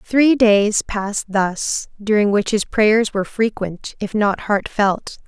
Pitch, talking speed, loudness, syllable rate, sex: 210 Hz, 150 wpm, -18 LUFS, 3.6 syllables/s, female